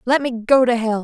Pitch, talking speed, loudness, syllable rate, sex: 240 Hz, 290 wpm, -17 LUFS, 5.2 syllables/s, female